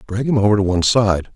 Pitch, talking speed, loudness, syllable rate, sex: 105 Hz, 265 wpm, -16 LUFS, 6.7 syllables/s, male